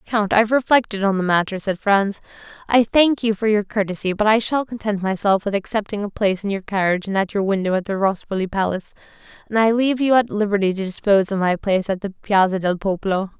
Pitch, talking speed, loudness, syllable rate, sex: 205 Hz, 230 wpm, -19 LUFS, 6.4 syllables/s, female